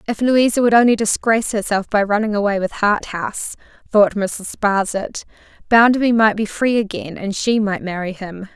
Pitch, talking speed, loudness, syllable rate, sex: 210 Hz, 170 wpm, -17 LUFS, 5.1 syllables/s, female